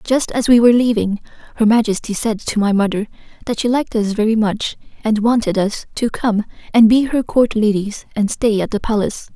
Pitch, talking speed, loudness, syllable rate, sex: 220 Hz, 205 wpm, -16 LUFS, 5.5 syllables/s, female